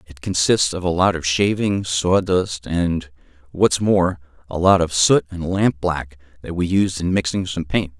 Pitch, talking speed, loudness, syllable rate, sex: 85 Hz, 180 wpm, -19 LUFS, 4.3 syllables/s, male